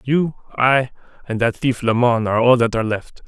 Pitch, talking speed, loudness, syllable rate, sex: 120 Hz, 220 wpm, -18 LUFS, 5.2 syllables/s, male